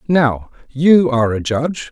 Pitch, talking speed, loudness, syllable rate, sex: 140 Hz, 155 wpm, -15 LUFS, 4.5 syllables/s, male